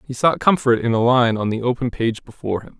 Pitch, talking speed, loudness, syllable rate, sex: 120 Hz, 260 wpm, -19 LUFS, 6.0 syllables/s, male